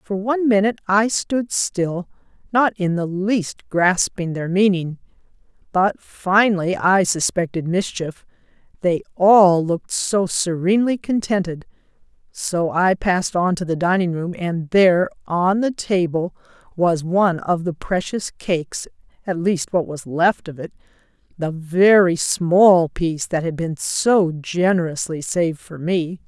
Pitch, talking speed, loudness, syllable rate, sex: 180 Hz, 140 wpm, -19 LUFS, 4.2 syllables/s, female